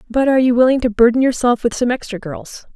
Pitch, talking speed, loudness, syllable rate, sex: 240 Hz, 240 wpm, -15 LUFS, 6.8 syllables/s, female